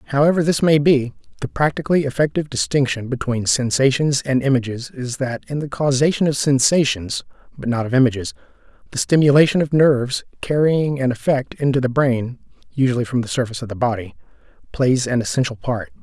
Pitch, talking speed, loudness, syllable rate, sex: 135 Hz, 165 wpm, -19 LUFS, 5.9 syllables/s, male